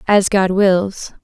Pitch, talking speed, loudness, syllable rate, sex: 190 Hz, 145 wpm, -15 LUFS, 3.0 syllables/s, female